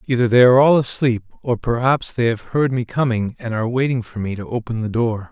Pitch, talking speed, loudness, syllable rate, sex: 120 Hz, 235 wpm, -18 LUFS, 5.8 syllables/s, male